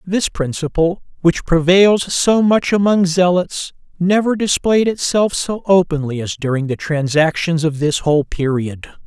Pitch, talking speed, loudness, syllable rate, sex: 170 Hz, 140 wpm, -16 LUFS, 4.3 syllables/s, male